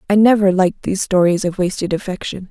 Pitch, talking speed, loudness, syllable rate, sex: 190 Hz, 190 wpm, -16 LUFS, 6.4 syllables/s, female